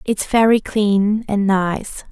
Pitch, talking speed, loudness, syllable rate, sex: 205 Hz, 140 wpm, -17 LUFS, 3.1 syllables/s, female